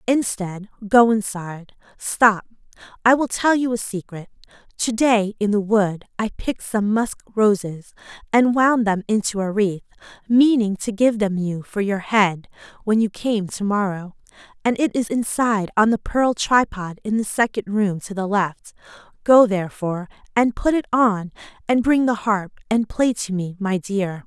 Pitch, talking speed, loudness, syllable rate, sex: 210 Hz, 170 wpm, -20 LUFS, 4.5 syllables/s, female